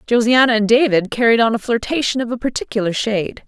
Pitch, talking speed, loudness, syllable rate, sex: 230 Hz, 190 wpm, -16 LUFS, 6.3 syllables/s, female